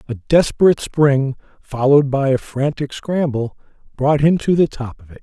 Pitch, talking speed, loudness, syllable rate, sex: 140 Hz, 170 wpm, -17 LUFS, 5.0 syllables/s, male